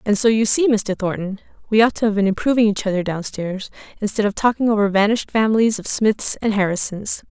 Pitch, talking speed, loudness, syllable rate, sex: 210 Hz, 215 wpm, -18 LUFS, 5.9 syllables/s, female